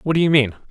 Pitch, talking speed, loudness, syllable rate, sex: 135 Hz, 340 wpm, -17 LUFS, 7.4 syllables/s, male